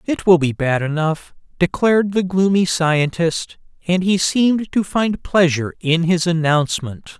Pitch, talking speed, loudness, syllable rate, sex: 170 Hz, 150 wpm, -17 LUFS, 4.5 syllables/s, male